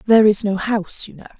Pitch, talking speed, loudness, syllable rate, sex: 205 Hz, 260 wpm, -18 LUFS, 6.9 syllables/s, female